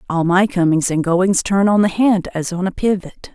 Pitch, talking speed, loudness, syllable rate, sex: 185 Hz, 235 wpm, -16 LUFS, 4.8 syllables/s, female